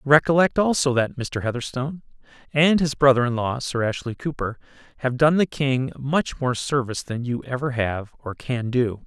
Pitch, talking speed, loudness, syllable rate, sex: 130 Hz, 180 wpm, -22 LUFS, 4.9 syllables/s, male